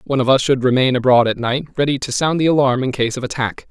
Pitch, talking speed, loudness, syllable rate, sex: 130 Hz, 275 wpm, -17 LUFS, 6.4 syllables/s, male